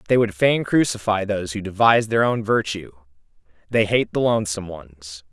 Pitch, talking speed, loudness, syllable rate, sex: 100 Hz, 160 wpm, -20 LUFS, 5.4 syllables/s, male